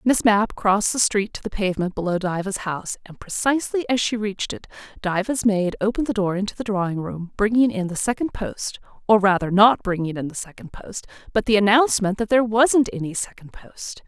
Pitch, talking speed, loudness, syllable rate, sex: 205 Hz, 205 wpm, -21 LUFS, 5.8 syllables/s, female